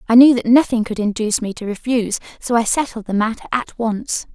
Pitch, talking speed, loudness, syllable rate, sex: 230 Hz, 220 wpm, -18 LUFS, 6.0 syllables/s, female